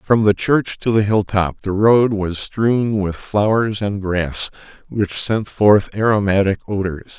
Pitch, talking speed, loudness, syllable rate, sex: 100 Hz, 165 wpm, -17 LUFS, 3.8 syllables/s, male